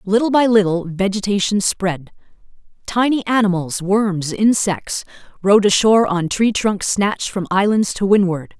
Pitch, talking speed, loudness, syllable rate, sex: 200 Hz, 120 wpm, -17 LUFS, 4.5 syllables/s, female